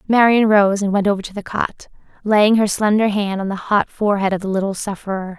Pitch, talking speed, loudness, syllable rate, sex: 200 Hz, 225 wpm, -17 LUFS, 5.8 syllables/s, female